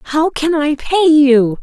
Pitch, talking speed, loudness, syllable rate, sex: 295 Hz, 185 wpm, -13 LUFS, 3.2 syllables/s, female